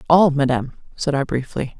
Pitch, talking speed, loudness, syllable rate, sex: 145 Hz, 165 wpm, -20 LUFS, 5.6 syllables/s, female